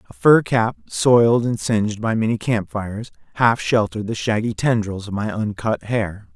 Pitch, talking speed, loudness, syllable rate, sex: 110 Hz, 180 wpm, -20 LUFS, 4.9 syllables/s, male